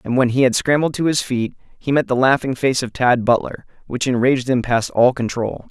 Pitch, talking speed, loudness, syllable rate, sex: 125 Hz, 230 wpm, -18 LUFS, 5.4 syllables/s, male